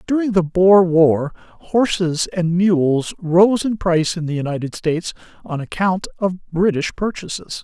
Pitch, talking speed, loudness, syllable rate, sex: 175 Hz, 150 wpm, -18 LUFS, 4.4 syllables/s, male